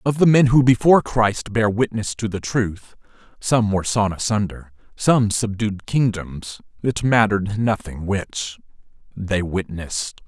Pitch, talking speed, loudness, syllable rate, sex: 105 Hz, 140 wpm, -20 LUFS, 4.3 syllables/s, male